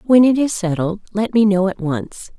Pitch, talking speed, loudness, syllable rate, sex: 200 Hz, 225 wpm, -17 LUFS, 4.8 syllables/s, female